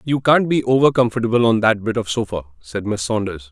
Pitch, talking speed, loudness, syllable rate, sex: 120 Hz, 220 wpm, -18 LUFS, 5.9 syllables/s, male